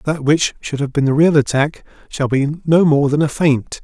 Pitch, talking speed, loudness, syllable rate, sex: 145 Hz, 235 wpm, -16 LUFS, 4.8 syllables/s, male